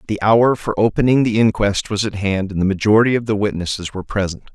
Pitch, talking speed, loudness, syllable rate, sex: 105 Hz, 225 wpm, -17 LUFS, 6.4 syllables/s, male